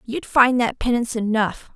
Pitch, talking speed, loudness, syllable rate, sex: 235 Hz, 170 wpm, -20 LUFS, 4.9 syllables/s, female